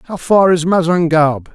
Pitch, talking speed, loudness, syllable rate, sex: 170 Hz, 155 wpm, -13 LUFS, 5.2 syllables/s, male